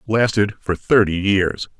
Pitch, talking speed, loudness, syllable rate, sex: 100 Hz, 170 wpm, -18 LUFS, 4.5 syllables/s, male